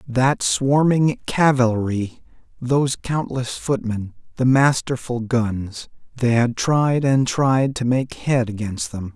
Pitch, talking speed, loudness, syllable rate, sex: 125 Hz, 120 wpm, -20 LUFS, 3.5 syllables/s, male